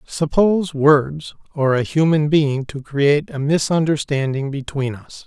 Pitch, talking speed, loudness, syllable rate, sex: 145 Hz, 135 wpm, -18 LUFS, 4.2 syllables/s, male